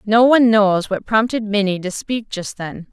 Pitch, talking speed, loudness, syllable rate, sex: 210 Hz, 205 wpm, -17 LUFS, 4.7 syllables/s, female